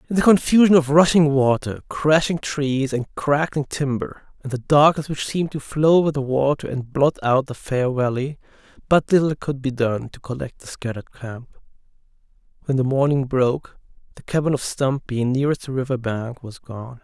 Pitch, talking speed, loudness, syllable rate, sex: 140 Hz, 180 wpm, -20 LUFS, 5.0 syllables/s, male